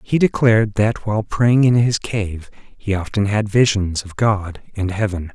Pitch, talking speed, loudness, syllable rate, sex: 105 Hz, 180 wpm, -18 LUFS, 4.4 syllables/s, male